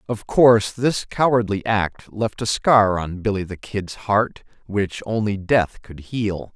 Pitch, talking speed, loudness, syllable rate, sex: 105 Hz, 165 wpm, -20 LUFS, 3.8 syllables/s, male